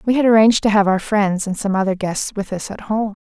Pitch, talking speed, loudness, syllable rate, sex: 205 Hz, 280 wpm, -17 LUFS, 6.0 syllables/s, female